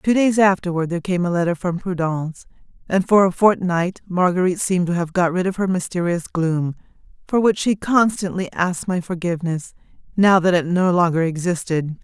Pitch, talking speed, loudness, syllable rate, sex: 180 Hz, 180 wpm, -19 LUFS, 5.5 syllables/s, female